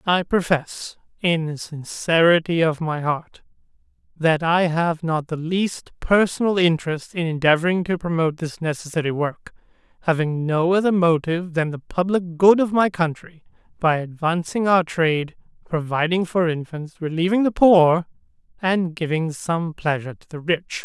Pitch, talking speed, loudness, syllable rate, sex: 165 Hz, 145 wpm, -21 LUFS, 4.7 syllables/s, male